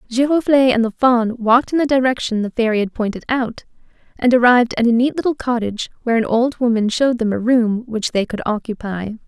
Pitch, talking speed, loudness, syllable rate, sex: 235 Hz, 205 wpm, -17 LUFS, 6.0 syllables/s, female